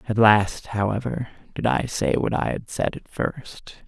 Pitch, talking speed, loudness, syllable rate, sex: 110 Hz, 185 wpm, -23 LUFS, 4.1 syllables/s, male